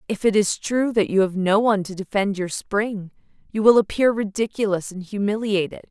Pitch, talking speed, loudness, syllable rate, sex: 205 Hz, 195 wpm, -21 LUFS, 5.3 syllables/s, female